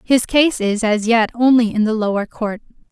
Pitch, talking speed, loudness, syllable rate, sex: 225 Hz, 205 wpm, -16 LUFS, 4.8 syllables/s, female